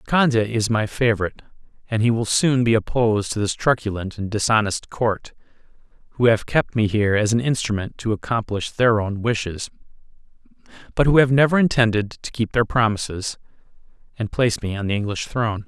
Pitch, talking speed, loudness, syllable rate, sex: 110 Hz, 170 wpm, -21 LUFS, 5.7 syllables/s, male